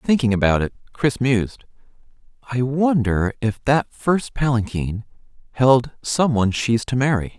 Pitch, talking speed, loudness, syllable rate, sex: 125 Hz, 130 wpm, -20 LUFS, 4.4 syllables/s, male